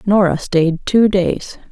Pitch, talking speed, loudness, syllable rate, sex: 185 Hz, 140 wpm, -15 LUFS, 3.3 syllables/s, female